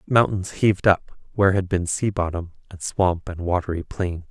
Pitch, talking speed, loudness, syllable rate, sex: 95 Hz, 180 wpm, -22 LUFS, 5.0 syllables/s, male